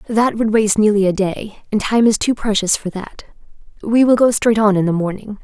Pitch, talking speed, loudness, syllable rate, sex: 210 Hz, 230 wpm, -16 LUFS, 5.5 syllables/s, female